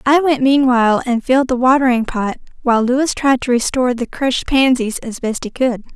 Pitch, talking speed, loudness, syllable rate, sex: 250 Hz, 200 wpm, -16 LUFS, 5.6 syllables/s, female